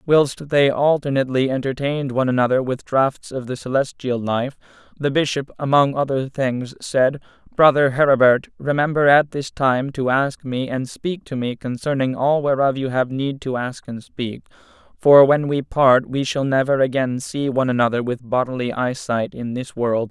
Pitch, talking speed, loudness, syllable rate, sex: 135 Hz, 175 wpm, -19 LUFS, 4.8 syllables/s, male